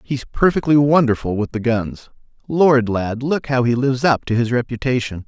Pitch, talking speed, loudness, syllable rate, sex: 125 Hz, 180 wpm, -18 LUFS, 5.1 syllables/s, male